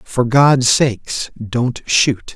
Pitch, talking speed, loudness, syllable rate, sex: 125 Hz, 125 wpm, -15 LUFS, 2.2 syllables/s, male